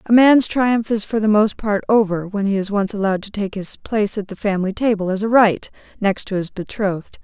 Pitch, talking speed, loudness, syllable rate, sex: 205 Hz, 240 wpm, -18 LUFS, 5.6 syllables/s, female